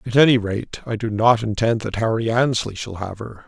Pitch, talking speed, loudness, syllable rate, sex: 115 Hz, 225 wpm, -20 LUFS, 5.5 syllables/s, male